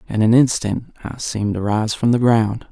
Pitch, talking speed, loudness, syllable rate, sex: 110 Hz, 220 wpm, -18 LUFS, 4.9 syllables/s, male